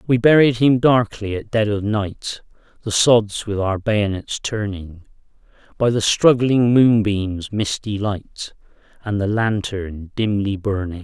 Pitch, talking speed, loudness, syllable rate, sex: 105 Hz, 135 wpm, -19 LUFS, 3.8 syllables/s, male